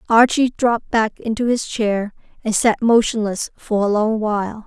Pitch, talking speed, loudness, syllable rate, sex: 220 Hz, 165 wpm, -18 LUFS, 4.6 syllables/s, female